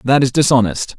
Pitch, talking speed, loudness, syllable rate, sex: 130 Hz, 180 wpm, -14 LUFS, 5.7 syllables/s, male